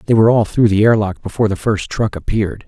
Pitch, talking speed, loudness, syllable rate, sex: 105 Hz, 270 wpm, -15 LUFS, 6.8 syllables/s, male